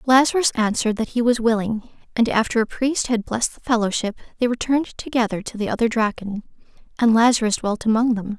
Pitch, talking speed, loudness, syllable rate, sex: 230 Hz, 185 wpm, -21 LUFS, 6.1 syllables/s, female